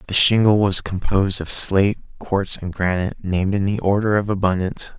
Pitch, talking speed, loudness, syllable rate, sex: 95 Hz, 180 wpm, -19 LUFS, 5.8 syllables/s, male